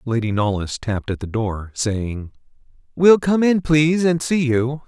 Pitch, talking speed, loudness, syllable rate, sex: 130 Hz, 160 wpm, -19 LUFS, 3.8 syllables/s, male